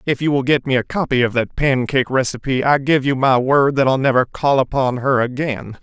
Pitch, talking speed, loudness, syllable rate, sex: 135 Hz, 235 wpm, -17 LUFS, 5.5 syllables/s, male